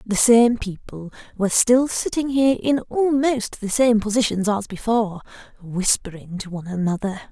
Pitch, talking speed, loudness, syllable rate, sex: 220 Hz, 150 wpm, -20 LUFS, 5.1 syllables/s, female